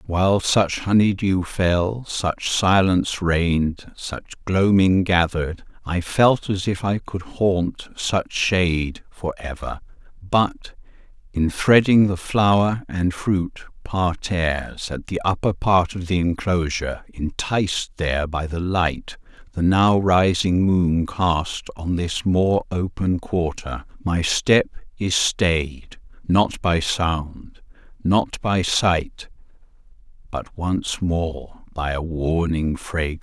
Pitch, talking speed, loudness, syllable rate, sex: 90 Hz, 125 wpm, -21 LUFS, 3.4 syllables/s, male